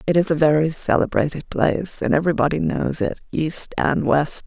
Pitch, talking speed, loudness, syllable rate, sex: 150 Hz, 175 wpm, -20 LUFS, 5.3 syllables/s, female